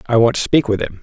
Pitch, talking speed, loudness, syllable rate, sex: 120 Hz, 350 wpm, -16 LUFS, 6.6 syllables/s, male